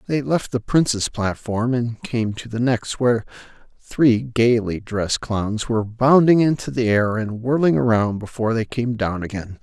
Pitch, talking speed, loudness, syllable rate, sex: 115 Hz, 175 wpm, -20 LUFS, 4.6 syllables/s, male